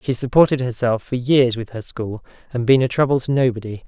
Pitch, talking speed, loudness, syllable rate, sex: 125 Hz, 215 wpm, -19 LUFS, 5.8 syllables/s, male